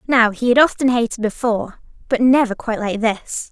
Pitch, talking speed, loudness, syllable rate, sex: 235 Hz, 190 wpm, -17 LUFS, 5.5 syllables/s, female